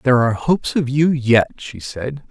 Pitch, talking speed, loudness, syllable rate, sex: 130 Hz, 210 wpm, -18 LUFS, 5.2 syllables/s, male